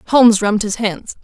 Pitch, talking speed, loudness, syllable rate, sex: 215 Hz, 195 wpm, -15 LUFS, 5.2 syllables/s, female